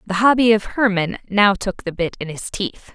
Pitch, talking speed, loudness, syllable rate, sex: 200 Hz, 225 wpm, -19 LUFS, 4.9 syllables/s, female